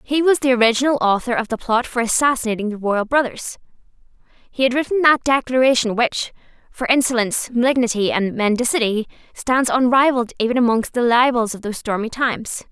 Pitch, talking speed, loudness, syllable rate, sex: 245 Hz, 160 wpm, -18 LUFS, 6.0 syllables/s, female